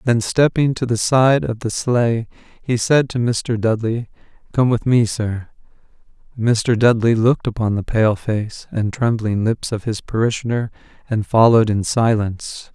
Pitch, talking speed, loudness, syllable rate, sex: 115 Hz, 160 wpm, -18 LUFS, 4.4 syllables/s, male